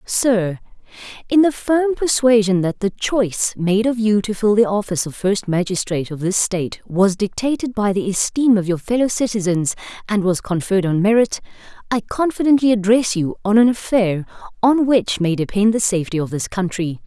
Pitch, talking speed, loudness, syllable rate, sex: 205 Hz, 175 wpm, -18 LUFS, 5.2 syllables/s, female